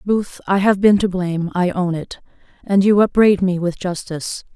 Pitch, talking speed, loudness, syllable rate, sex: 185 Hz, 200 wpm, -17 LUFS, 5.0 syllables/s, female